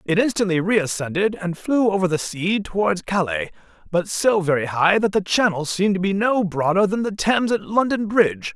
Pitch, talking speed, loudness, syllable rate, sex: 190 Hz, 195 wpm, -20 LUFS, 5.2 syllables/s, male